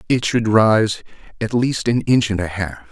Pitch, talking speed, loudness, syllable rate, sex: 110 Hz, 205 wpm, -18 LUFS, 4.6 syllables/s, male